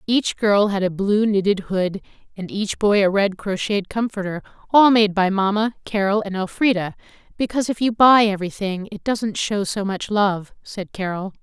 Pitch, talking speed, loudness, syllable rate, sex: 205 Hz, 180 wpm, -20 LUFS, 3.3 syllables/s, female